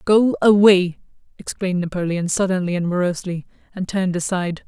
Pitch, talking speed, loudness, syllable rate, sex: 185 Hz, 130 wpm, -19 LUFS, 5.9 syllables/s, female